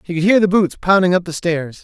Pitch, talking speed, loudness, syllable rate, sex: 180 Hz, 295 wpm, -15 LUFS, 5.9 syllables/s, male